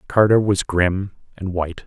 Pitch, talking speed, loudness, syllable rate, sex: 95 Hz, 160 wpm, -19 LUFS, 4.7 syllables/s, male